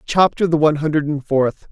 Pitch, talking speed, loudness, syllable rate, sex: 150 Hz, 210 wpm, -17 LUFS, 5.7 syllables/s, male